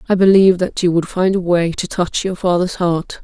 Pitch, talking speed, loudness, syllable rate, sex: 180 Hz, 240 wpm, -16 LUFS, 5.3 syllables/s, female